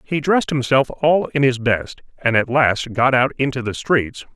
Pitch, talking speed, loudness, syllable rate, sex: 130 Hz, 205 wpm, -18 LUFS, 4.5 syllables/s, male